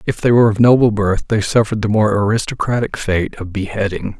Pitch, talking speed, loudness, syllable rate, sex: 110 Hz, 200 wpm, -16 LUFS, 6.0 syllables/s, male